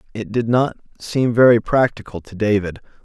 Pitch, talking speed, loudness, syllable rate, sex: 110 Hz, 160 wpm, -18 LUFS, 5.3 syllables/s, male